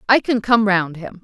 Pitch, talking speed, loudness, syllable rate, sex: 205 Hz, 245 wpm, -17 LUFS, 4.7 syllables/s, female